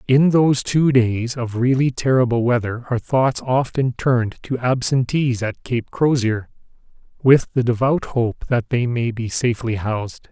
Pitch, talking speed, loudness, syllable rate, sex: 125 Hz, 155 wpm, -19 LUFS, 4.4 syllables/s, male